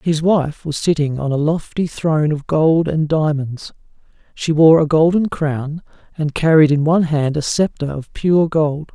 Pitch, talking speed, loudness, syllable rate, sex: 155 Hz, 180 wpm, -16 LUFS, 4.4 syllables/s, male